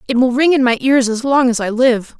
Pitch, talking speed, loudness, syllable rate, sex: 250 Hz, 300 wpm, -14 LUFS, 5.6 syllables/s, female